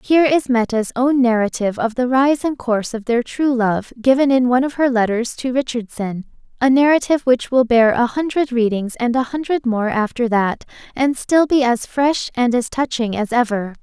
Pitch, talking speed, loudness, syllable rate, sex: 245 Hz, 200 wpm, -17 LUFS, 5.1 syllables/s, female